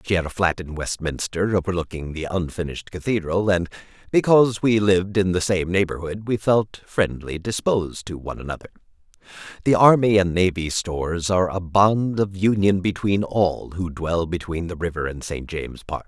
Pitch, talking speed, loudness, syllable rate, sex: 90 Hz, 170 wpm, -22 LUFS, 5.3 syllables/s, male